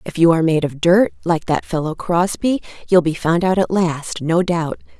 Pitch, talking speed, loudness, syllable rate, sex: 170 Hz, 215 wpm, -18 LUFS, 4.8 syllables/s, female